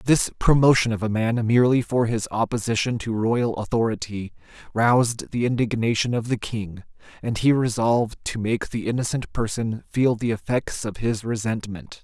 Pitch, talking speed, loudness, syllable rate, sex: 115 Hz, 160 wpm, -23 LUFS, 5.0 syllables/s, male